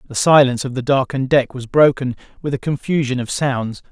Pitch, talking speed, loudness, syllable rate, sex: 135 Hz, 200 wpm, -17 LUFS, 5.9 syllables/s, male